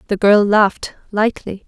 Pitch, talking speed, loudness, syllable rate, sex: 205 Hz, 145 wpm, -15 LUFS, 4.6 syllables/s, female